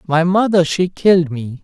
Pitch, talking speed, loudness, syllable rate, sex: 170 Hz, 185 wpm, -15 LUFS, 4.6 syllables/s, male